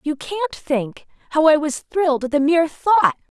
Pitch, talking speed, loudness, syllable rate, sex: 305 Hz, 195 wpm, -19 LUFS, 4.6 syllables/s, female